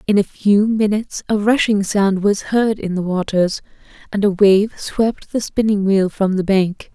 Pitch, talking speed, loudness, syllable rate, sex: 200 Hz, 190 wpm, -17 LUFS, 4.3 syllables/s, female